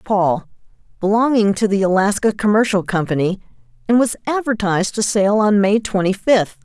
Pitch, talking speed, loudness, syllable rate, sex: 205 Hz, 145 wpm, -17 LUFS, 5.2 syllables/s, female